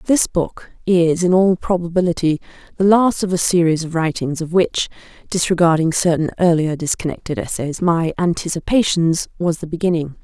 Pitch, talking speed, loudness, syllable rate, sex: 170 Hz, 135 wpm, -18 LUFS, 5.1 syllables/s, female